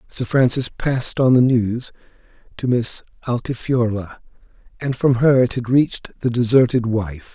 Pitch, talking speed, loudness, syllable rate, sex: 120 Hz, 145 wpm, -18 LUFS, 4.6 syllables/s, male